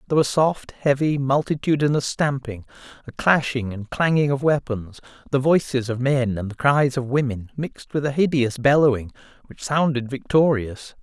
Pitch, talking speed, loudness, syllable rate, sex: 135 Hz, 160 wpm, -21 LUFS, 5.0 syllables/s, male